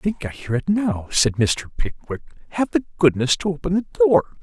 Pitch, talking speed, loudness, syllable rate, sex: 165 Hz, 215 wpm, -21 LUFS, 5.0 syllables/s, male